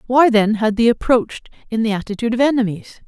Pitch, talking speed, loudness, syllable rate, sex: 230 Hz, 195 wpm, -17 LUFS, 6.3 syllables/s, female